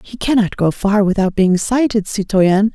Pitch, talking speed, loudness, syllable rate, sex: 205 Hz, 175 wpm, -15 LUFS, 4.5 syllables/s, female